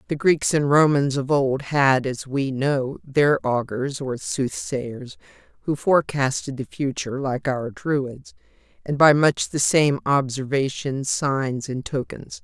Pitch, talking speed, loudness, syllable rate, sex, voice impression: 135 Hz, 135 wpm, -22 LUFS, 3.8 syllables/s, female, very feminine, very adult-like, slightly calm, elegant